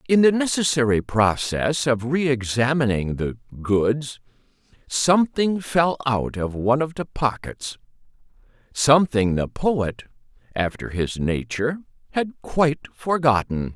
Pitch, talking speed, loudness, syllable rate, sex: 130 Hz, 115 wpm, -22 LUFS, 4.2 syllables/s, male